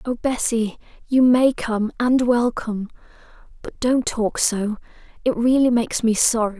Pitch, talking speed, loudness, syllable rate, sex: 235 Hz, 135 wpm, -20 LUFS, 4.5 syllables/s, female